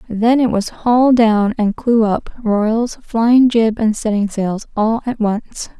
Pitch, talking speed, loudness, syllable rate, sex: 225 Hz, 175 wpm, -15 LUFS, 3.4 syllables/s, female